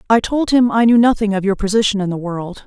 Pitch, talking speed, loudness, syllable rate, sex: 215 Hz, 270 wpm, -15 LUFS, 6.1 syllables/s, female